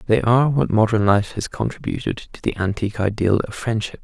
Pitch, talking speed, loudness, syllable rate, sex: 110 Hz, 195 wpm, -20 LUFS, 5.7 syllables/s, male